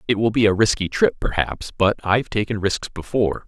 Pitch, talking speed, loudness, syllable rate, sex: 100 Hz, 205 wpm, -20 LUFS, 5.5 syllables/s, male